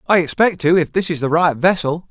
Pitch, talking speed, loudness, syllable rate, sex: 170 Hz, 255 wpm, -16 LUFS, 5.6 syllables/s, male